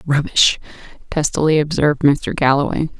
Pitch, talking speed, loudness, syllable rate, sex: 145 Hz, 100 wpm, -16 LUFS, 5.2 syllables/s, female